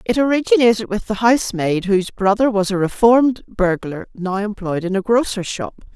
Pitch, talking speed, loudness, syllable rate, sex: 210 Hz, 170 wpm, -17 LUFS, 5.4 syllables/s, female